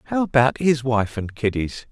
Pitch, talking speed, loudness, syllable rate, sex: 125 Hz, 190 wpm, -21 LUFS, 4.8 syllables/s, male